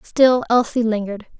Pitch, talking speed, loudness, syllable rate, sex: 230 Hz, 130 wpm, -17 LUFS, 5.1 syllables/s, female